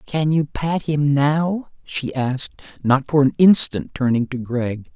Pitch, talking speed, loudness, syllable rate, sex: 140 Hz, 170 wpm, -19 LUFS, 4.0 syllables/s, male